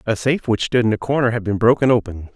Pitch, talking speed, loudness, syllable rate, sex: 115 Hz, 280 wpm, -18 LUFS, 6.8 syllables/s, male